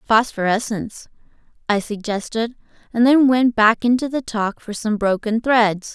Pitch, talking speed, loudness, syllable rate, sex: 225 Hz, 140 wpm, -19 LUFS, 4.5 syllables/s, female